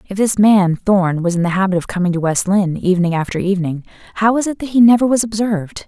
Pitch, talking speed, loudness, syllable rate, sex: 195 Hz, 245 wpm, -15 LUFS, 6.5 syllables/s, female